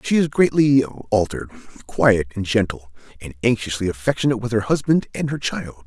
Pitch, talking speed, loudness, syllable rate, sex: 115 Hz, 155 wpm, -20 LUFS, 5.5 syllables/s, male